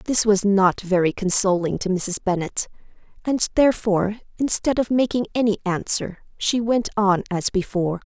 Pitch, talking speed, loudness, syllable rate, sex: 205 Hz, 150 wpm, -21 LUFS, 5.0 syllables/s, female